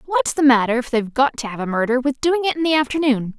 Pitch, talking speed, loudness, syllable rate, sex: 265 Hz, 285 wpm, -19 LUFS, 6.6 syllables/s, female